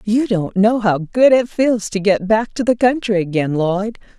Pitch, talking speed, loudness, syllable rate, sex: 210 Hz, 215 wpm, -16 LUFS, 4.3 syllables/s, female